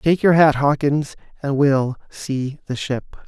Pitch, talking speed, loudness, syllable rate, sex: 140 Hz, 165 wpm, -19 LUFS, 3.7 syllables/s, male